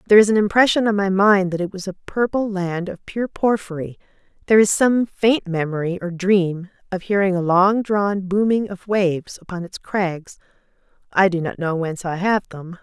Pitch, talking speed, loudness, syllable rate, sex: 190 Hz, 195 wpm, -19 LUFS, 5.1 syllables/s, female